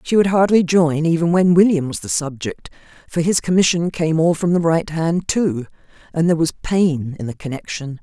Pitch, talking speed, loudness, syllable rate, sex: 165 Hz, 200 wpm, -18 LUFS, 5.1 syllables/s, female